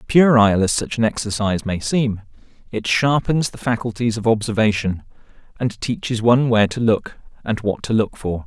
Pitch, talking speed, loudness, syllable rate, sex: 110 Hz, 170 wpm, -19 LUFS, 5.4 syllables/s, male